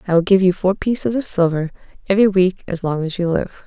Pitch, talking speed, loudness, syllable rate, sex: 185 Hz, 245 wpm, -18 LUFS, 6.1 syllables/s, female